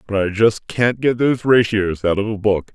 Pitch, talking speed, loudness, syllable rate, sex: 105 Hz, 240 wpm, -17 LUFS, 5.0 syllables/s, male